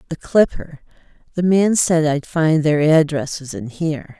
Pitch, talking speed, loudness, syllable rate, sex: 160 Hz, 155 wpm, -17 LUFS, 4.4 syllables/s, female